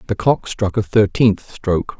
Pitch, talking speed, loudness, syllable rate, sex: 100 Hz, 180 wpm, -18 LUFS, 4.4 syllables/s, male